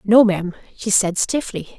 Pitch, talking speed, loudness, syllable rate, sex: 200 Hz, 170 wpm, -18 LUFS, 4.1 syllables/s, female